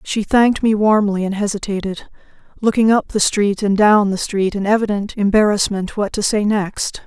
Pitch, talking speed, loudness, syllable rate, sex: 205 Hz, 180 wpm, -17 LUFS, 5.0 syllables/s, female